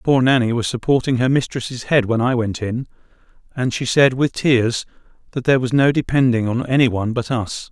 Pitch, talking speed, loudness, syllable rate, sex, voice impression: 125 Hz, 200 wpm, -18 LUFS, 5.4 syllables/s, male, masculine, very adult-like, slightly thick, slightly fluent, sincere, calm, reassuring